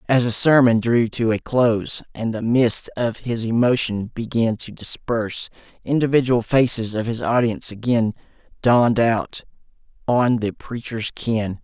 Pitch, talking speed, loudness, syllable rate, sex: 115 Hz, 145 wpm, -20 LUFS, 4.5 syllables/s, male